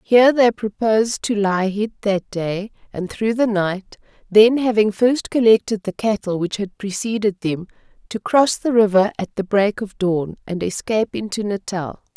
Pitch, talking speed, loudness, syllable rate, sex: 210 Hz, 175 wpm, -19 LUFS, 4.6 syllables/s, female